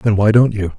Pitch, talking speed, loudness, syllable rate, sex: 105 Hz, 305 wpm, -14 LUFS, 5.6 syllables/s, male